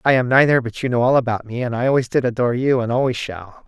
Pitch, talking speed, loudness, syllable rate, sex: 125 Hz, 295 wpm, -18 LUFS, 6.7 syllables/s, male